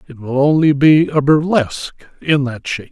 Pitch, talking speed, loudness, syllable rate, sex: 145 Hz, 185 wpm, -14 LUFS, 5.1 syllables/s, male